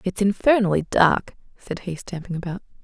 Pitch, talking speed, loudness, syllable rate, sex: 190 Hz, 150 wpm, -22 LUFS, 5.3 syllables/s, female